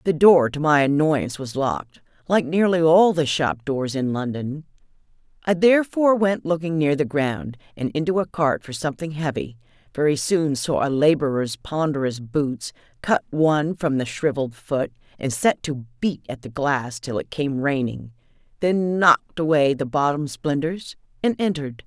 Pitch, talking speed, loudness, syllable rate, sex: 150 Hz, 165 wpm, -22 LUFS, 4.8 syllables/s, female